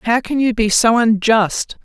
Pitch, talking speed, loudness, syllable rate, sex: 225 Hz, 195 wpm, -15 LUFS, 4.2 syllables/s, female